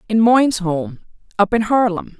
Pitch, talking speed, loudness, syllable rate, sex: 215 Hz, 135 wpm, -17 LUFS, 4.7 syllables/s, female